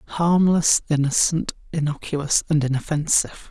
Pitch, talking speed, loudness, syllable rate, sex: 155 Hz, 85 wpm, -20 LUFS, 4.5 syllables/s, male